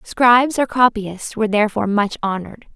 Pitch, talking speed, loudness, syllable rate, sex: 220 Hz, 150 wpm, -17 LUFS, 5.8 syllables/s, female